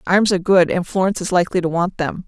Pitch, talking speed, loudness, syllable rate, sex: 180 Hz, 265 wpm, -18 LUFS, 7.0 syllables/s, female